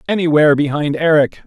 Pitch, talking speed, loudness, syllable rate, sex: 150 Hz, 125 wpm, -14 LUFS, 6.5 syllables/s, male